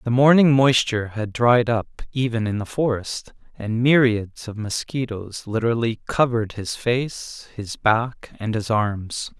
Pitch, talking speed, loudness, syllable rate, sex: 115 Hz, 145 wpm, -21 LUFS, 4.2 syllables/s, male